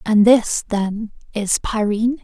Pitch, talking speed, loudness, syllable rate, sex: 215 Hz, 135 wpm, -18 LUFS, 3.8 syllables/s, female